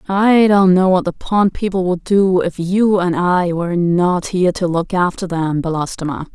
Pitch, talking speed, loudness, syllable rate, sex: 180 Hz, 200 wpm, -16 LUFS, 4.6 syllables/s, female